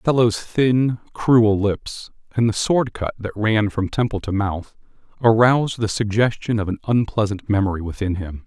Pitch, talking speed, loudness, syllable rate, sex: 110 Hz, 170 wpm, -20 LUFS, 4.7 syllables/s, male